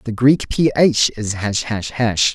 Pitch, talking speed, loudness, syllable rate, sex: 115 Hz, 205 wpm, -17 LUFS, 3.7 syllables/s, male